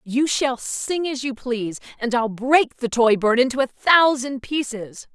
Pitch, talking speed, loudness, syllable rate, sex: 250 Hz, 185 wpm, -20 LUFS, 4.2 syllables/s, female